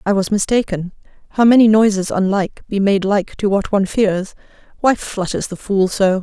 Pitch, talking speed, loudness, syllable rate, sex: 200 Hz, 165 wpm, -16 LUFS, 5.2 syllables/s, female